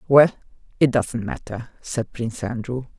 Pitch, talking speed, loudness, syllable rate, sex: 120 Hz, 140 wpm, -23 LUFS, 4.5 syllables/s, female